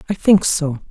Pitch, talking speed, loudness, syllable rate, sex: 170 Hz, 200 wpm, -16 LUFS, 4.8 syllables/s, female